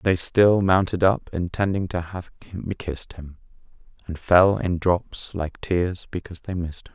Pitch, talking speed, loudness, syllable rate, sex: 90 Hz, 165 wpm, -23 LUFS, 4.4 syllables/s, male